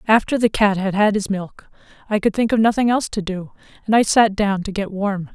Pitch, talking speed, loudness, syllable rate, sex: 205 Hz, 245 wpm, -19 LUFS, 5.6 syllables/s, female